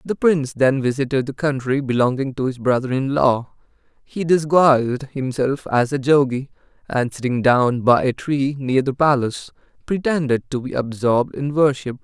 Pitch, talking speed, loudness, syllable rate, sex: 135 Hz, 165 wpm, -19 LUFS, 4.9 syllables/s, male